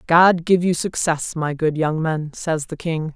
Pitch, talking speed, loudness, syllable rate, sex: 160 Hz, 210 wpm, -20 LUFS, 4.0 syllables/s, female